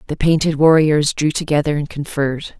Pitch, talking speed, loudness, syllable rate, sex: 150 Hz, 160 wpm, -16 LUFS, 5.4 syllables/s, female